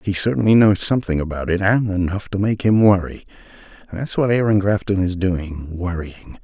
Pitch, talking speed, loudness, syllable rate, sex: 95 Hz, 175 wpm, -18 LUFS, 5.3 syllables/s, male